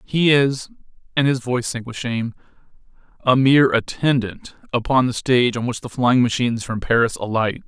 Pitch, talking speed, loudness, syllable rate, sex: 125 Hz, 155 wpm, -19 LUFS, 5.5 syllables/s, male